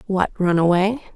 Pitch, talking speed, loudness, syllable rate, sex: 190 Hz, 155 wpm, -19 LUFS, 4.4 syllables/s, female